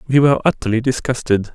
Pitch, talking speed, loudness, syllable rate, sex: 125 Hz, 155 wpm, -17 LUFS, 6.7 syllables/s, male